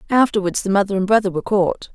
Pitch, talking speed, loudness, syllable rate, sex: 200 Hz, 215 wpm, -18 LUFS, 6.9 syllables/s, female